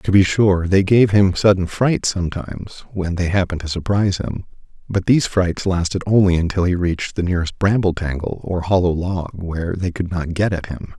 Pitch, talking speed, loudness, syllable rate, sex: 90 Hz, 200 wpm, -18 LUFS, 5.5 syllables/s, male